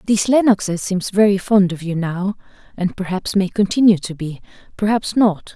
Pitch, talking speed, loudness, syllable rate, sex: 195 Hz, 175 wpm, -18 LUFS, 5.2 syllables/s, female